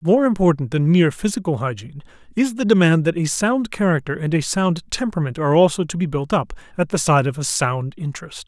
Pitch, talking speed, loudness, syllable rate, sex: 170 Hz, 210 wpm, -19 LUFS, 6.1 syllables/s, male